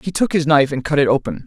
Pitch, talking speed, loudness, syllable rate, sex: 145 Hz, 325 wpm, -17 LUFS, 7.0 syllables/s, male